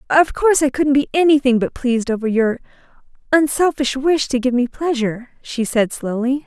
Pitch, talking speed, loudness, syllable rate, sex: 265 Hz, 175 wpm, -17 LUFS, 5.4 syllables/s, female